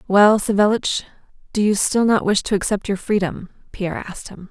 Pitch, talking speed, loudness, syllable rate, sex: 200 Hz, 185 wpm, -19 LUFS, 5.5 syllables/s, female